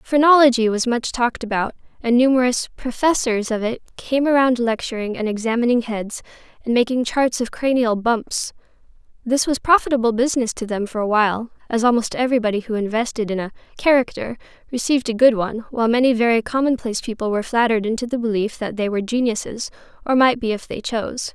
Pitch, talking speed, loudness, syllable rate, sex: 235 Hz, 175 wpm, -19 LUFS, 6.2 syllables/s, female